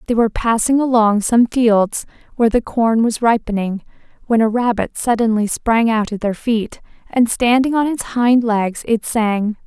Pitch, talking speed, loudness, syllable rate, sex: 225 Hz, 175 wpm, -16 LUFS, 4.5 syllables/s, female